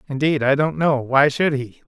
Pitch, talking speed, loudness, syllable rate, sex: 140 Hz, 190 wpm, -19 LUFS, 4.9 syllables/s, male